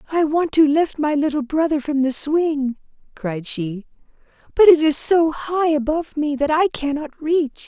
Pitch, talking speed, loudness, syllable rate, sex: 300 Hz, 180 wpm, -19 LUFS, 4.4 syllables/s, female